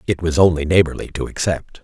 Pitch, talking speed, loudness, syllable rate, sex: 85 Hz, 195 wpm, -18 LUFS, 6.1 syllables/s, male